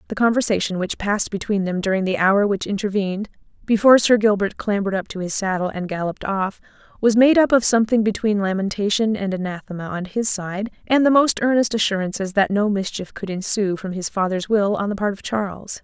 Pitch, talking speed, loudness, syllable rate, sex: 205 Hz, 200 wpm, -20 LUFS, 5.9 syllables/s, female